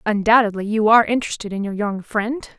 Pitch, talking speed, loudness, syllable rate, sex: 215 Hz, 185 wpm, -19 LUFS, 6.1 syllables/s, female